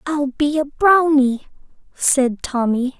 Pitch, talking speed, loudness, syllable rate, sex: 280 Hz, 120 wpm, -17 LUFS, 3.4 syllables/s, female